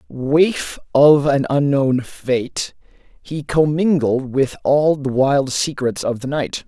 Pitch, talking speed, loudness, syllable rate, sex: 135 Hz, 135 wpm, -17 LUFS, 3.2 syllables/s, male